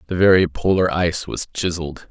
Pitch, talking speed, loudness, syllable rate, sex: 90 Hz, 170 wpm, -19 LUFS, 5.9 syllables/s, male